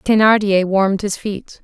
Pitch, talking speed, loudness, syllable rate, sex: 200 Hz, 145 wpm, -16 LUFS, 4.4 syllables/s, female